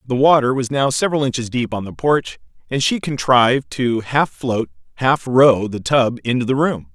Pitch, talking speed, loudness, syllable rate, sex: 125 Hz, 200 wpm, -17 LUFS, 4.9 syllables/s, male